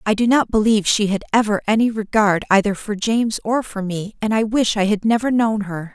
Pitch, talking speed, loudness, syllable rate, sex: 215 Hz, 230 wpm, -18 LUFS, 5.5 syllables/s, female